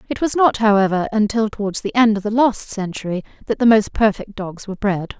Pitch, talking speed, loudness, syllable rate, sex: 210 Hz, 220 wpm, -18 LUFS, 5.7 syllables/s, female